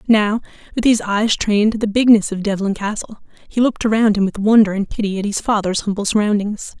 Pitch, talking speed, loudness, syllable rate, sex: 210 Hz, 210 wpm, -17 LUFS, 6.0 syllables/s, female